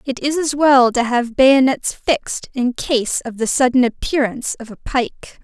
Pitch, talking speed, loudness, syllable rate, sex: 255 Hz, 190 wpm, -17 LUFS, 4.7 syllables/s, female